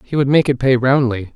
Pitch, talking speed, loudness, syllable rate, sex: 130 Hz, 265 wpm, -15 LUFS, 5.6 syllables/s, male